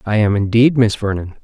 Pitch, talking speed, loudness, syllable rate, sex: 110 Hz, 210 wpm, -15 LUFS, 5.5 syllables/s, male